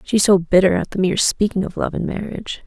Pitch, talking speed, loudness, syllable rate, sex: 195 Hz, 250 wpm, -18 LUFS, 6.2 syllables/s, female